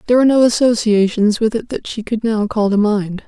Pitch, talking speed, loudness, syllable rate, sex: 220 Hz, 240 wpm, -15 LUFS, 5.9 syllables/s, female